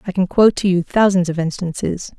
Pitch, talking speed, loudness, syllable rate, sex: 185 Hz, 220 wpm, -17 LUFS, 6.0 syllables/s, female